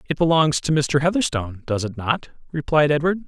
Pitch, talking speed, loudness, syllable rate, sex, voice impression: 150 Hz, 185 wpm, -21 LUFS, 5.5 syllables/s, male, very masculine, very adult-like, very middle-aged, very thick, tensed, powerful, bright, soft, slightly muffled, fluent, slightly raspy, cool, very intellectual, refreshing, sincere, very calm, mature, very friendly, very reassuring, unique, slightly elegant, wild, sweet, lively, kind, slightly modest